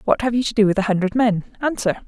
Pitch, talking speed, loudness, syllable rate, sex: 215 Hz, 260 wpm, -19 LUFS, 6.7 syllables/s, female